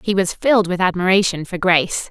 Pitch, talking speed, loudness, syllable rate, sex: 185 Hz, 200 wpm, -17 LUFS, 6.0 syllables/s, female